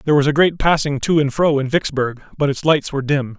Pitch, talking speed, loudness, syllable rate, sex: 145 Hz, 265 wpm, -17 LUFS, 6.2 syllables/s, male